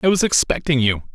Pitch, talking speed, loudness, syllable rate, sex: 145 Hz, 210 wpm, -18 LUFS, 5.8 syllables/s, male